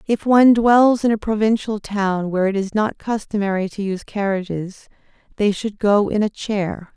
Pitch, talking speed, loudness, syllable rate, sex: 205 Hz, 180 wpm, -19 LUFS, 5.0 syllables/s, female